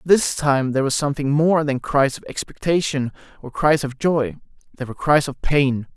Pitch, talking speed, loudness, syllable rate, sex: 140 Hz, 190 wpm, -20 LUFS, 5.3 syllables/s, male